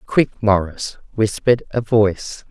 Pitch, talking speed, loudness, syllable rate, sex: 110 Hz, 120 wpm, -18 LUFS, 4.3 syllables/s, female